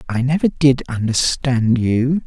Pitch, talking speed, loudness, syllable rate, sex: 130 Hz, 130 wpm, -17 LUFS, 3.9 syllables/s, male